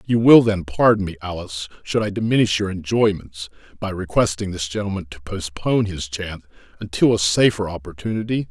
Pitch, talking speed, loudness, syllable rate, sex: 95 Hz, 160 wpm, -20 LUFS, 5.6 syllables/s, male